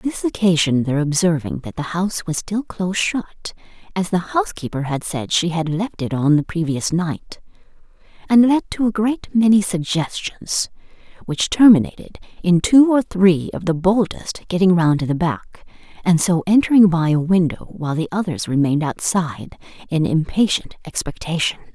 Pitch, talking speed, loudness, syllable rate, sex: 180 Hz, 165 wpm, -18 LUFS, 5.0 syllables/s, female